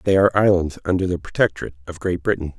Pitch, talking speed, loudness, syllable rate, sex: 90 Hz, 210 wpm, -20 LUFS, 7.6 syllables/s, male